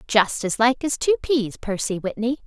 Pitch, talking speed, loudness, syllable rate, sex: 235 Hz, 195 wpm, -22 LUFS, 4.6 syllables/s, female